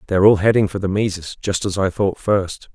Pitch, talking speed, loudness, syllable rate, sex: 95 Hz, 240 wpm, -18 LUFS, 5.5 syllables/s, male